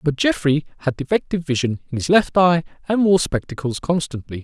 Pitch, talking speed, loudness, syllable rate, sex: 155 Hz, 175 wpm, -20 LUFS, 5.7 syllables/s, male